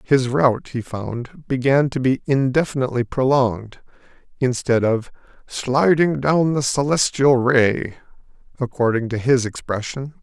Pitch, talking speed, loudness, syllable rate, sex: 130 Hz, 115 wpm, -19 LUFS, 4.4 syllables/s, male